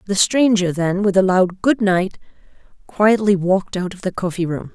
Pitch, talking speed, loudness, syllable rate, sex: 190 Hz, 190 wpm, -18 LUFS, 4.9 syllables/s, female